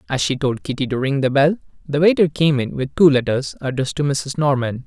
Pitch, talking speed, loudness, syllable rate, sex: 140 Hz, 235 wpm, -18 LUFS, 5.9 syllables/s, male